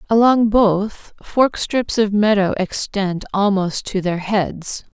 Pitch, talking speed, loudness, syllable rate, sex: 205 Hz, 135 wpm, -18 LUFS, 3.4 syllables/s, female